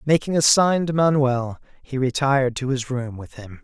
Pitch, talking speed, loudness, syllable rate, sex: 135 Hz, 215 wpm, -20 LUFS, 5.1 syllables/s, male